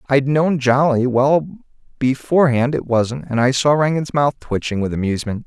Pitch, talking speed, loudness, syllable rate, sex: 135 Hz, 165 wpm, -17 LUFS, 5.0 syllables/s, male